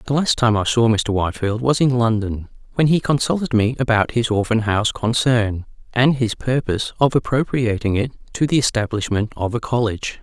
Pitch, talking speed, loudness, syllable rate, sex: 115 Hz, 180 wpm, -19 LUFS, 5.4 syllables/s, male